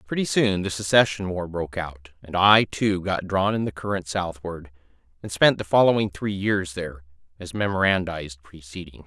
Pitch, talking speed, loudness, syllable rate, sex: 90 Hz, 170 wpm, -23 LUFS, 4.4 syllables/s, male